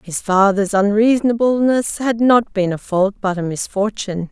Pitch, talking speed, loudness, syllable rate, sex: 210 Hz, 155 wpm, -17 LUFS, 4.8 syllables/s, female